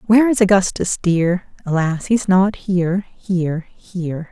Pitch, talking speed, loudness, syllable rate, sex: 185 Hz, 140 wpm, -18 LUFS, 4.4 syllables/s, female